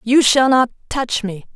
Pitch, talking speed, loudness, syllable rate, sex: 245 Hz, 195 wpm, -16 LUFS, 4.1 syllables/s, female